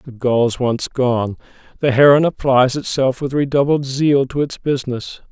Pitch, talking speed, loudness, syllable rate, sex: 130 Hz, 160 wpm, -17 LUFS, 4.5 syllables/s, male